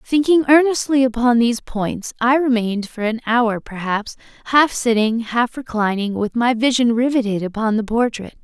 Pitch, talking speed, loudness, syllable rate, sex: 235 Hz, 155 wpm, -18 LUFS, 4.8 syllables/s, female